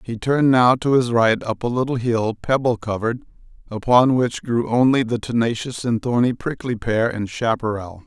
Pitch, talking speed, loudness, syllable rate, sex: 120 Hz, 180 wpm, -20 LUFS, 5.0 syllables/s, male